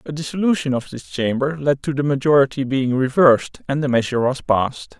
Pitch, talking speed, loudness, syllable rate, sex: 135 Hz, 190 wpm, -19 LUFS, 5.8 syllables/s, male